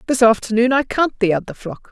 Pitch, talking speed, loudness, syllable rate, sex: 225 Hz, 220 wpm, -17 LUFS, 5.8 syllables/s, female